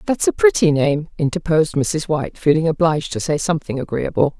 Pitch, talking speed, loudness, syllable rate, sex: 160 Hz, 180 wpm, -18 LUFS, 6.0 syllables/s, female